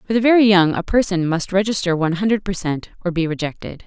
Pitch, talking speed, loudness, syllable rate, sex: 185 Hz, 215 wpm, -18 LUFS, 6.4 syllables/s, female